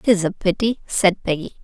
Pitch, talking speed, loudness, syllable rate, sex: 190 Hz, 220 wpm, -20 LUFS, 5.8 syllables/s, female